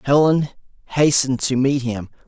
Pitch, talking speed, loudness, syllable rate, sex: 135 Hz, 130 wpm, -18 LUFS, 5.3 syllables/s, male